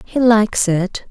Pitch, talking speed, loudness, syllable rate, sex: 210 Hz, 165 wpm, -15 LUFS, 4.0 syllables/s, female